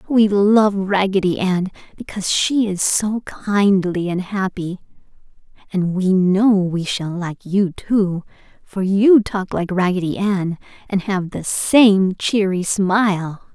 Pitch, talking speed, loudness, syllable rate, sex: 195 Hz, 135 wpm, -18 LUFS, 3.6 syllables/s, female